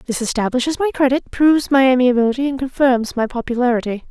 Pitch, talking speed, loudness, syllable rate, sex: 255 Hz, 160 wpm, -17 LUFS, 6.2 syllables/s, female